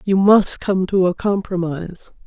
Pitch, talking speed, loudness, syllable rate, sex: 185 Hz, 160 wpm, -17 LUFS, 4.4 syllables/s, female